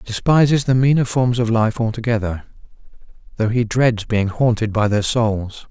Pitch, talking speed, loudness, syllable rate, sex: 115 Hz, 160 wpm, -18 LUFS, 4.8 syllables/s, male